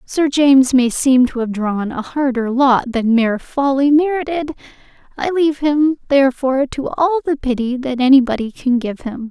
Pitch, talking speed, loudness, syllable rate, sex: 265 Hz, 175 wpm, -16 LUFS, 5.0 syllables/s, female